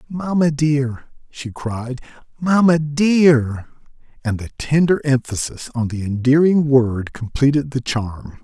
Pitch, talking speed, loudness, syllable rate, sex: 135 Hz, 120 wpm, -18 LUFS, 3.8 syllables/s, male